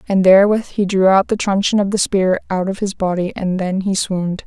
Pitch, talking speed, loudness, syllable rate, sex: 195 Hz, 240 wpm, -16 LUFS, 5.5 syllables/s, female